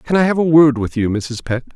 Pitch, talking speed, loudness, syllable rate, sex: 140 Hz, 310 wpm, -15 LUFS, 5.6 syllables/s, male